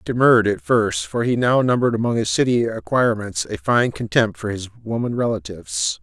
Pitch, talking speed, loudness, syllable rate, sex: 115 Hz, 190 wpm, -20 LUFS, 5.7 syllables/s, male